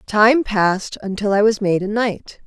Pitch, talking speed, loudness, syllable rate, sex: 205 Hz, 195 wpm, -18 LUFS, 4.4 syllables/s, female